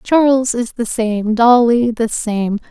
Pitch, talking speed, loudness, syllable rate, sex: 235 Hz, 155 wpm, -15 LUFS, 3.6 syllables/s, female